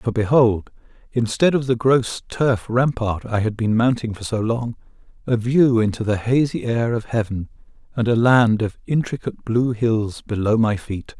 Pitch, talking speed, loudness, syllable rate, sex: 115 Hz, 175 wpm, -20 LUFS, 4.6 syllables/s, male